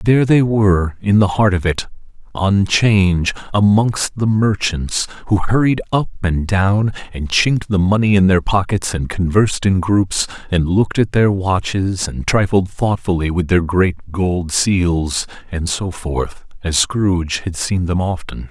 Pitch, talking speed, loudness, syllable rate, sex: 95 Hz, 170 wpm, -16 LUFS, 4.3 syllables/s, male